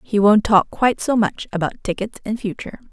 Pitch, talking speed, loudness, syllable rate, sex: 215 Hz, 205 wpm, -19 LUFS, 5.7 syllables/s, female